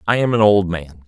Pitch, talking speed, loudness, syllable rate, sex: 100 Hz, 280 wpm, -16 LUFS, 5.6 syllables/s, male